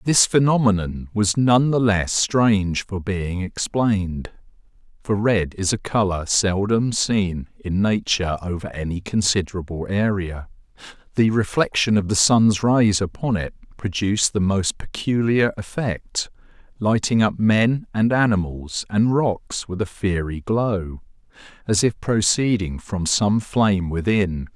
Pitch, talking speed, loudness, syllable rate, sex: 100 Hz, 130 wpm, -20 LUFS, 4.1 syllables/s, male